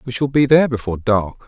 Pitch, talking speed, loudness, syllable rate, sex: 125 Hz, 245 wpm, -17 LUFS, 7.0 syllables/s, male